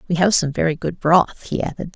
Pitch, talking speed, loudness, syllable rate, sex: 170 Hz, 245 wpm, -19 LUFS, 6.0 syllables/s, female